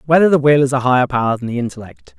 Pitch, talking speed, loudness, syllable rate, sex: 135 Hz, 275 wpm, -15 LUFS, 7.4 syllables/s, male